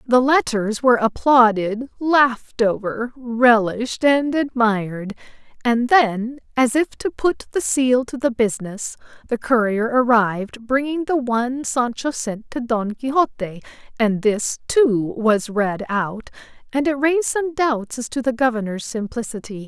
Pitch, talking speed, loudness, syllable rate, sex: 240 Hz, 145 wpm, -20 LUFS, 4.2 syllables/s, female